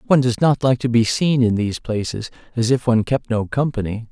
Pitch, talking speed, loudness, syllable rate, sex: 120 Hz, 235 wpm, -19 LUFS, 6.0 syllables/s, male